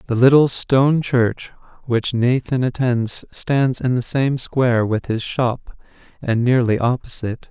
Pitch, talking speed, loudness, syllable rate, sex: 125 Hz, 145 wpm, -18 LUFS, 4.2 syllables/s, male